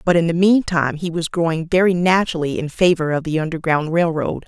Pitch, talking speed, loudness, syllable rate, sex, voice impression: 165 Hz, 215 wpm, -18 LUFS, 6.0 syllables/s, female, very feminine, very middle-aged, thin, tensed, slightly powerful, bright, soft, clear, fluent, slightly raspy, slightly cool, intellectual, very refreshing, sincere, calm, slightly friendly, slightly reassuring, very unique, slightly elegant, lively, slightly strict, slightly intense, sharp